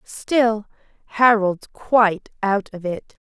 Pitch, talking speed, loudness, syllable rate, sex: 215 Hz, 110 wpm, -19 LUFS, 3.3 syllables/s, female